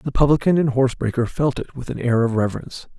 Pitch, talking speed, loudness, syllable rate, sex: 130 Hz, 240 wpm, -20 LUFS, 6.6 syllables/s, male